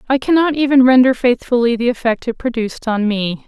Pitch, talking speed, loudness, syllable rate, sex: 245 Hz, 190 wpm, -15 LUFS, 5.8 syllables/s, female